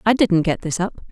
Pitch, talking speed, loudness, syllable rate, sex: 190 Hz, 270 wpm, -19 LUFS, 5.3 syllables/s, female